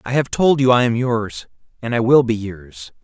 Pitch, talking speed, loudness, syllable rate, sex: 115 Hz, 235 wpm, -17 LUFS, 4.7 syllables/s, male